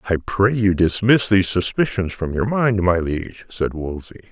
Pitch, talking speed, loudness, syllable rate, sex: 95 Hz, 180 wpm, -19 LUFS, 4.9 syllables/s, male